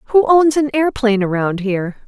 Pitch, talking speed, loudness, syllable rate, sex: 240 Hz, 175 wpm, -15 LUFS, 6.6 syllables/s, female